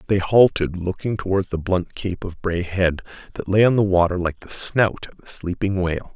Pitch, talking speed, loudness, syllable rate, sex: 95 Hz, 215 wpm, -21 LUFS, 5.2 syllables/s, male